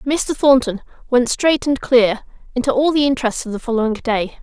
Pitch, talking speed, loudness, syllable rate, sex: 255 Hz, 190 wpm, -17 LUFS, 5.3 syllables/s, female